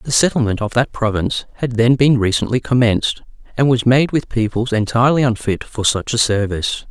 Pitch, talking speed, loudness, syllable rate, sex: 120 Hz, 180 wpm, -16 LUFS, 5.7 syllables/s, male